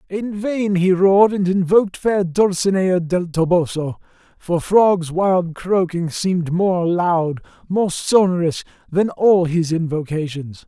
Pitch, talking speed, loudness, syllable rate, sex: 180 Hz, 130 wpm, -18 LUFS, 3.9 syllables/s, male